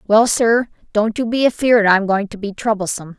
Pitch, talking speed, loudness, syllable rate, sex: 215 Hz, 205 wpm, -17 LUFS, 5.2 syllables/s, female